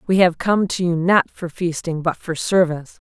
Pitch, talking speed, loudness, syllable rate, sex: 175 Hz, 215 wpm, -19 LUFS, 4.9 syllables/s, female